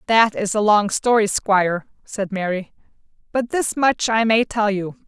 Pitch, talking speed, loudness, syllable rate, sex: 210 Hz, 175 wpm, -19 LUFS, 4.4 syllables/s, female